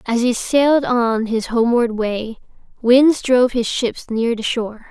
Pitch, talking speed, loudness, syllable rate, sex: 240 Hz, 170 wpm, -17 LUFS, 4.4 syllables/s, female